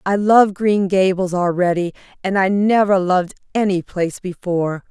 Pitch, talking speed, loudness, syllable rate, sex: 190 Hz, 145 wpm, -17 LUFS, 5.0 syllables/s, female